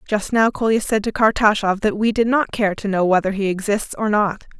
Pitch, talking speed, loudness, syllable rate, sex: 210 Hz, 235 wpm, -19 LUFS, 5.4 syllables/s, female